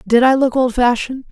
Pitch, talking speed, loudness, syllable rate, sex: 250 Hz, 230 wpm, -15 LUFS, 6.0 syllables/s, female